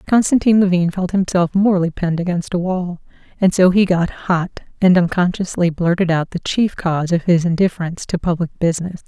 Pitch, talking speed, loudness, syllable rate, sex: 180 Hz, 180 wpm, -17 LUFS, 5.7 syllables/s, female